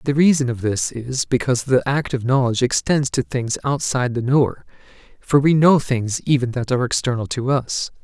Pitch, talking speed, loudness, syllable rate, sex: 130 Hz, 195 wpm, -19 LUFS, 5.4 syllables/s, male